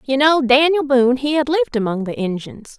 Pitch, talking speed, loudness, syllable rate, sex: 270 Hz, 215 wpm, -16 LUFS, 5.4 syllables/s, female